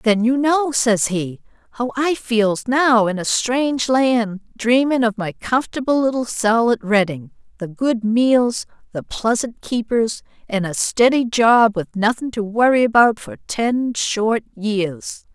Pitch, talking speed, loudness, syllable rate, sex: 230 Hz, 155 wpm, -18 LUFS, 3.9 syllables/s, female